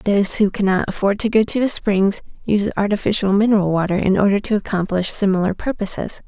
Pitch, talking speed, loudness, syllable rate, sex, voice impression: 200 Hz, 180 wpm, -18 LUFS, 6.1 syllables/s, female, feminine, adult-like, slightly relaxed, powerful, slightly muffled, raspy, intellectual, calm, friendly, reassuring, elegant, slightly lively, kind